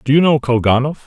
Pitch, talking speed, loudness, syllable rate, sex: 135 Hz, 225 wpm, -14 LUFS, 6.4 syllables/s, male